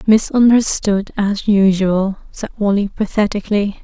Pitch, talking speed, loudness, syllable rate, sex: 205 Hz, 95 wpm, -15 LUFS, 4.4 syllables/s, female